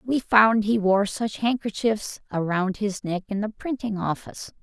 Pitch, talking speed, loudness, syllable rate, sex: 210 Hz, 170 wpm, -24 LUFS, 4.4 syllables/s, female